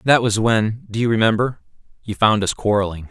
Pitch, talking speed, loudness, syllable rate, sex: 110 Hz, 155 wpm, -18 LUFS, 5.5 syllables/s, male